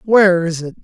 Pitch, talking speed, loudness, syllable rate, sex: 180 Hz, 215 wpm, -14 LUFS, 5.5 syllables/s, male